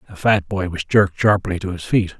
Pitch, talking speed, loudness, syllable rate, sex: 95 Hz, 245 wpm, -19 LUFS, 5.6 syllables/s, male